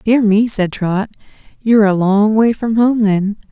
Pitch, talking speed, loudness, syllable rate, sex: 210 Hz, 190 wpm, -14 LUFS, 4.3 syllables/s, female